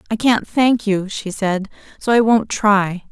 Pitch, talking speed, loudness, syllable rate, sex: 210 Hz, 195 wpm, -17 LUFS, 3.9 syllables/s, female